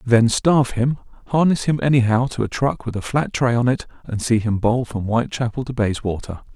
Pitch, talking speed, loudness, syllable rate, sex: 120 Hz, 210 wpm, -20 LUFS, 5.5 syllables/s, male